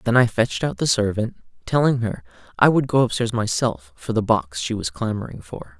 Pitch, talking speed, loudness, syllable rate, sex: 120 Hz, 205 wpm, -21 LUFS, 5.3 syllables/s, male